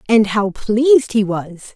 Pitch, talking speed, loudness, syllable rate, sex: 220 Hz, 170 wpm, -16 LUFS, 4.2 syllables/s, female